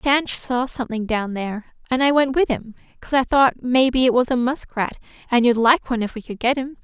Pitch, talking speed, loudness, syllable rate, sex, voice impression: 250 Hz, 255 wpm, -20 LUFS, 5.6 syllables/s, female, feminine, adult-like, tensed, powerful, bright, slightly soft, clear, fluent, cute, intellectual, friendly, elegant, slightly sweet, lively, slightly sharp